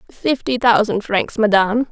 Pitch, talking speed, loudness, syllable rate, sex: 220 Hz, 125 wpm, -17 LUFS, 4.8 syllables/s, female